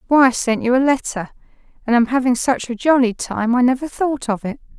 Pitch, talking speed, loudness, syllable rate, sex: 250 Hz, 215 wpm, -18 LUFS, 5.5 syllables/s, female